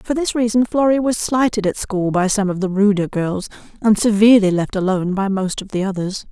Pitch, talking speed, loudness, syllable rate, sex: 205 Hz, 220 wpm, -17 LUFS, 5.6 syllables/s, female